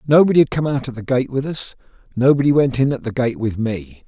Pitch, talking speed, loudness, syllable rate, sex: 130 Hz, 250 wpm, -18 LUFS, 6.0 syllables/s, male